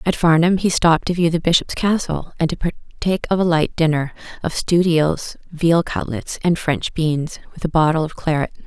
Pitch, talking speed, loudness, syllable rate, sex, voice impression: 165 Hz, 200 wpm, -19 LUFS, 5.2 syllables/s, female, feminine, slightly adult-like, slightly cute, calm, friendly, slightly sweet